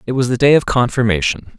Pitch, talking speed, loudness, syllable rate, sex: 125 Hz, 225 wpm, -15 LUFS, 6.4 syllables/s, male